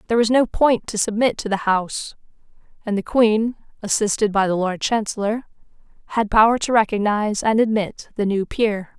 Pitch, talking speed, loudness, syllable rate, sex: 215 Hz, 175 wpm, -20 LUFS, 5.4 syllables/s, female